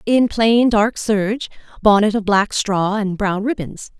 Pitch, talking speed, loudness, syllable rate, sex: 210 Hz, 165 wpm, -17 LUFS, 4.0 syllables/s, female